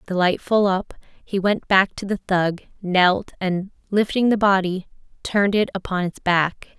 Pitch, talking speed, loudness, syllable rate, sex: 190 Hz, 175 wpm, -21 LUFS, 4.5 syllables/s, female